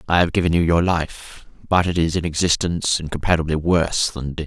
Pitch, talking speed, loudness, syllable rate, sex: 85 Hz, 215 wpm, -20 LUFS, 5.8 syllables/s, male